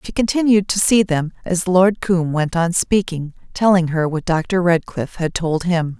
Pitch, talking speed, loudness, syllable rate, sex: 175 Hz, 190 wpm, -18 LUFS, 4.5 syllables/s, female